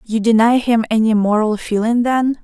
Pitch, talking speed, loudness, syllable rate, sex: 225 Hz, 170 wpm, -15 LUFS, 4.9 syllables/s, female